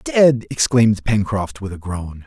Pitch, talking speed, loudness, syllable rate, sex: 110 Hz, 160 wpm, -18 LUFS, 4.1 syllables/s, male